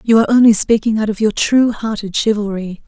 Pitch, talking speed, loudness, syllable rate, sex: 215 Hz, 210 wpm, -14 LUFS, 5.9 syllables/s, female